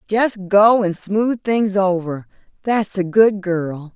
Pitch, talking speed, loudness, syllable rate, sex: 195 Hz, 135 wpm, -17 LUFS, 3.3 syllables/s, female